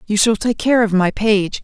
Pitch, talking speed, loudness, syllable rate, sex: 210 Hz, 260 wpm, -16 LUFS, 4.8 syllables/s, female